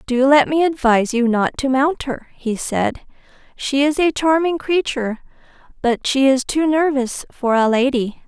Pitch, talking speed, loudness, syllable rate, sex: 265 Hz, 175 wpm, -18 LUFS, 4.6 syllables/s, female